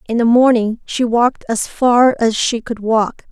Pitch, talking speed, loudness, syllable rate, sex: 235 Hz, 200 wpm, -15 LUFS, 4.3 syllables/s, female